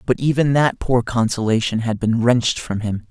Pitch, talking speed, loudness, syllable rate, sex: 120 Hz, 195 wpm, -19 LUFS, 5.1 syllables/s, male